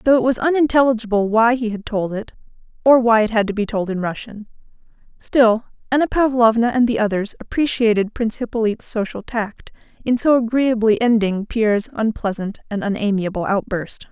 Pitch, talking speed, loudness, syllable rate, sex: 225 Hz, 160 wpm, -18 LUFS, 5.4 syllables/s, female